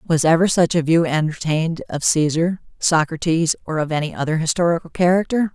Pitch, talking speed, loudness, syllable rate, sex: 165 Hz, 160 wpm, -19 LUFS, 5.7 syllables/s, female